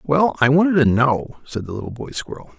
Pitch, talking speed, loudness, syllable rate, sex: 140 Hz, 230 wpm, -19 LUFS, 5.4 syllables/s, male